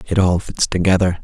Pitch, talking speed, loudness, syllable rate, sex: 90 Hz, 195 wpm, -17 LUFS, 5.9 syllables/s, male